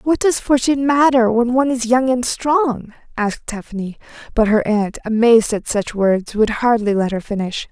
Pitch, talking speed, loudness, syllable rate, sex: 235 Hz, 185 wpm, -17 LUFS, 5.0 syllables/s, female